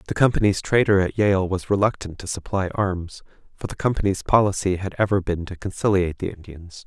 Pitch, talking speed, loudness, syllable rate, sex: 95 Hz, 185 wpm, -22 LUFS, 5.7 syllables/s, male